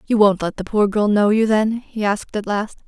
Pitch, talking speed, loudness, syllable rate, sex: 210 Hz, 270 wpm, -18 LUFS, 5.3 syllables/s, female